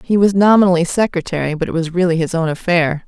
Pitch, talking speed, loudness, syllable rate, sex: 175 Hz, 215 wpm, -15 LUFS, 6.4 syllables/s, female